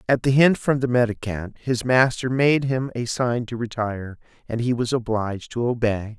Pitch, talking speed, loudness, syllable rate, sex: 120 Hz, 195 wpm, -22 LUFS, 5.0 syllables/s, male